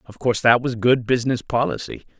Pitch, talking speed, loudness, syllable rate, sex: 120 Hz, 190 wpm, -20 LUFS, 6.2 syllables/s, male